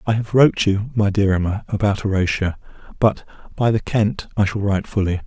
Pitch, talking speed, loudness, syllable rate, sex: 105 Hz, 195 wpm, -19 LUFS, 5.7 syllables/s, male